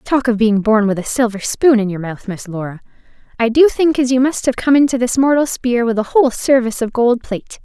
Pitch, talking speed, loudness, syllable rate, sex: 240 Hz, 250 wpm, -15 LUFS, 5.8 syllables/s, female